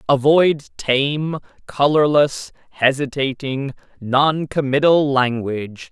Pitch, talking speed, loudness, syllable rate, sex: 140 Hz, 70 wpm, -18 LUFS, 3.4 syllables/s, male